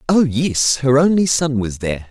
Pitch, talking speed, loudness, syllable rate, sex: 135 Hz, 200 wpm, -16 LUFS, 4.7 syllables/s, male